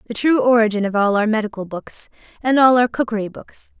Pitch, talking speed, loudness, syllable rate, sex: 225 Hz, 190 wpm, -18 LUFS, 5.9 syllables/s, female